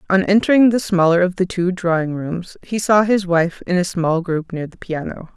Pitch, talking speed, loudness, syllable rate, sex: 180 Hz, 225 wpm, -18 LUFS, 5.0 syllables/s, female